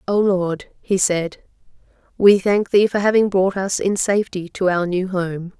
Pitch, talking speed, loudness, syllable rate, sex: 190 Hz, 180 wpm, -18 LUFS, 4.4 syllables/s, female